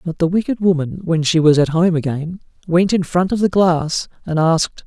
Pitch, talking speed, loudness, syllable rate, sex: 170 Hz, 220 wpm, -17 LUFS, 5.1 syllables/s, male